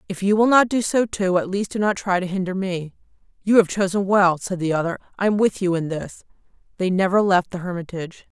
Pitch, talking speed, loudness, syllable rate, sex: 190 Hz, 235 wpm, -21 LUFS, 5.9 syllables/s, female